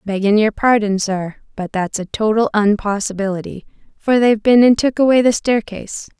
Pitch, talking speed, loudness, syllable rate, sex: 215 Hz, 155 wpm, -16 LUFS, 5.3 syllables/s, female